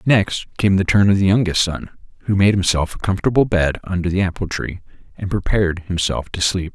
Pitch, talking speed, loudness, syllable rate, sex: 95 Hz, 205 wpm, -18 LUFS, 5.6 syllables/s, male